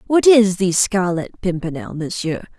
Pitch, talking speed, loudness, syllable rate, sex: 195 Hz, 140 wpm, -18 LUFS, 4.5 syllables/s, female